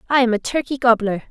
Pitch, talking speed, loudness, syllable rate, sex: 240 Hz, 230 wpm, -18 LUFS, 6.7 syllables/s, female